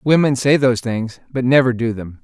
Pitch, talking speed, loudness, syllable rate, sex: 125 Hz, 215 wpm, -17 LUFS, 5.3 syllables/s, male